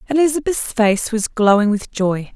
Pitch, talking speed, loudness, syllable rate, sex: 230 Hz, 155 wpm, -17 LUFS, 4.6 syllables/s, female